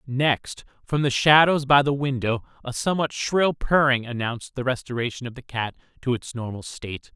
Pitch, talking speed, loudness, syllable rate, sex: 130 Hz, 175 wpm, -23 LUFS, 5.2 syllables/s, male